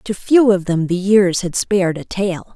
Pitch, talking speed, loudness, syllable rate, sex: 190 Hz, 235 wpm, -16 LUFS, 4.4 syllables/s, female